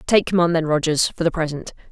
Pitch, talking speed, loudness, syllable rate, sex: 165 Hz, 220 wpm, -19 LUFS, 6.1 syllables/s, female